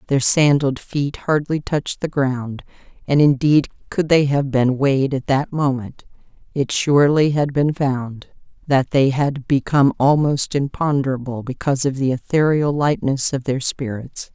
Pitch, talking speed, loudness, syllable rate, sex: 140 Hz, 150 wpm, -18 LUFS, 4.6 syllables/s, female